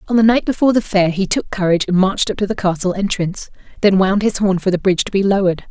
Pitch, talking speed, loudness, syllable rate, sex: 195 Hz, 275 wpm, -16 LUFS, 7.2 syllables/s, female